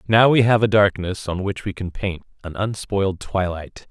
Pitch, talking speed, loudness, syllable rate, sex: 100 Hz, 200 wpm, -20 LUFS, 4.8 syllables/s, male